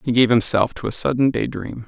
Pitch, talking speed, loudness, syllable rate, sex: 120 Hz, 255 wpm, -19 LUFS, 5.7 syllables/s, male